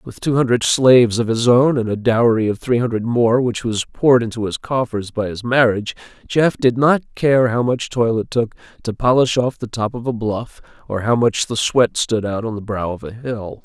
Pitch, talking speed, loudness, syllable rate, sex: 115 Hz, 235 wpm, -17 LUFS, 5.0 syllables/s, male